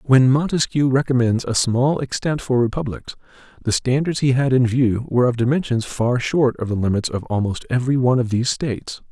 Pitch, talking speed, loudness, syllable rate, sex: 125 Hz, 190 wpm, -19 LUFS, 5.6 syllables/s, male